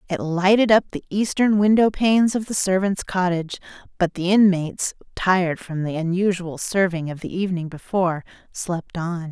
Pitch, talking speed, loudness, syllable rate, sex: 185 Hz, 160 wpm, -21 LUFS, 5.2 syllables/s, female